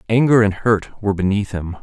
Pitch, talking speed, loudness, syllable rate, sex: 105 Hz, 195 wpm, -18 LUFS, 5.6 syllables/s, male